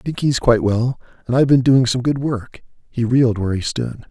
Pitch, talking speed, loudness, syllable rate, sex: 125 Hz, 220 wpm, -18 LUFS, 5.8 syllables/s, male